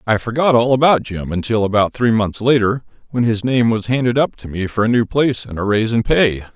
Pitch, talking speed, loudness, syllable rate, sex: 115 Hz, 245 wpm, -16 LUFS, 5.8 syllables/s, male